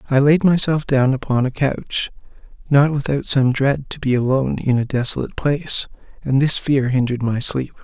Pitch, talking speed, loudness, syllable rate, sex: 135 Hz, 185 wpm, -18 LUFS, 5.3 syllables/s, male